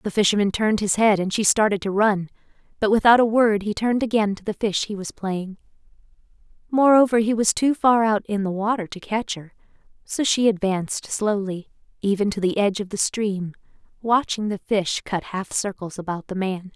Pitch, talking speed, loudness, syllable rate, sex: 205 Hz, 195 wpm, -21 LUFS, 5.3 syllables/s, female